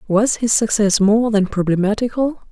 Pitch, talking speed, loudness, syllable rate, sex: 215 Hz, 145 wpm, -17 LUFS, 4.9 syllables/s, female